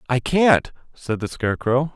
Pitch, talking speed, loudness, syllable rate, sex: 135 Hz, 155 wpm, -20 LUFS, 4.5 syllables/s, male